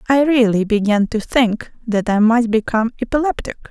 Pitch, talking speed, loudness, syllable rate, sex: 230 Hz, 160 wpm, -17 LUFS, 5.3 syllables/s, female